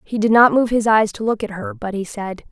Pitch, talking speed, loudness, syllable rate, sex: 215 Hz, 310 wpm, -17 LUFS, 5.5 syllables/s, female